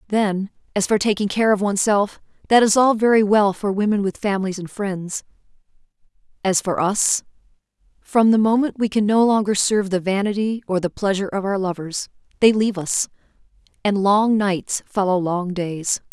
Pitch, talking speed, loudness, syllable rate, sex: 200 Hz, 170 wpm, -20 LUFS, 5.2 syllables/s, female